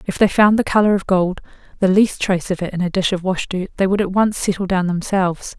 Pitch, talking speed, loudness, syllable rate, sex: 190 Hz, 270 wpm, -18 LUFS, 6.0 syllables/s, female